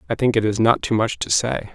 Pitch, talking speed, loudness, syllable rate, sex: 110 Hz, 310 wpm, -20 LUFS, 5.9 syllables/s, male